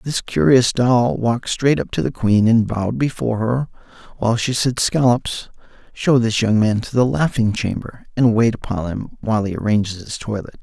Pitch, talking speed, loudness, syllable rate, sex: 115 Hz, 190 wpm, -18 LUFS, 5.2 syllables/s, male